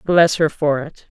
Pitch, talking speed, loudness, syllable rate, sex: 155 Hz, 200 wpm, -17 LUFS, 4.1 syllables/s, female